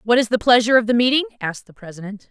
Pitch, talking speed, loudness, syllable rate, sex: 230 Hz, 260 wpm, -17 LUFS, 7.4 syllables/s, female